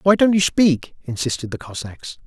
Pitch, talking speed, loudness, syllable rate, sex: 155 Hz, 185 wpm, -19 LUFS, 4.9 syllables/s, male